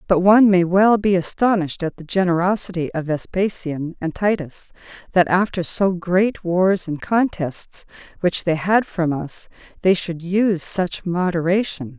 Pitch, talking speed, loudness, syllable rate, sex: 180 Hz, 150 wpm, -19 LUFS, 4.4 syllables/s, female